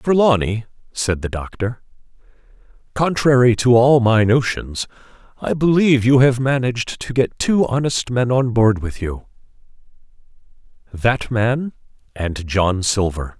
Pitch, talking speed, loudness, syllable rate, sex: 120 Hz, 120 wpm, -18 LUFS, 4.3 syllables/s, male